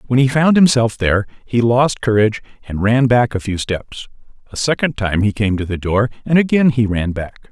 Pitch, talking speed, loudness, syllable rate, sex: 115 Hz, 215 wpm, -16 LUFS, 5.2 syllables/s, male